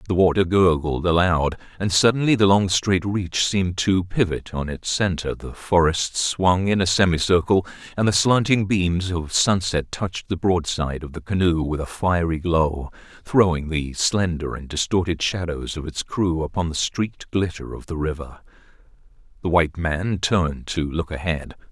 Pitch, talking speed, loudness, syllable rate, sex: 90 Hz, 170 wpm, -21 LUFS, 4.7 syllables/s, male